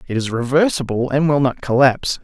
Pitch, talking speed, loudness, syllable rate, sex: 135 Hz, 190 wpm, -17 LUFS, 5.8 syllables/s, male